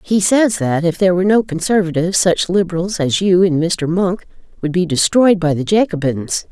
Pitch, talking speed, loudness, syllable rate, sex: 180 Hz, 195 wpm, -15 LUFS, 5.3 syllables/s, female